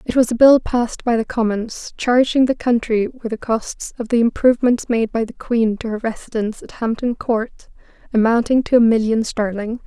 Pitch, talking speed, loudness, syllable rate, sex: 230 Hz, 195 wpm, -18 LUFS, 5.2 syllables/s, female